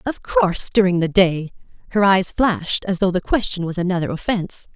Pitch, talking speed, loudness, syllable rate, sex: 190 Hz, 190 wpm, -19 LUFS, 5.6 syllables/s, female